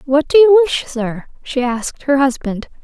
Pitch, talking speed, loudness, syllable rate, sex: 275 Hz, 190 wpm, -15 LUFS, 5.3 syllables/s, female